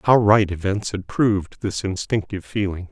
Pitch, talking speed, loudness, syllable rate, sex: 100 Hz, 165 wpm, -21 LUFS, 5.1 syllables/s, male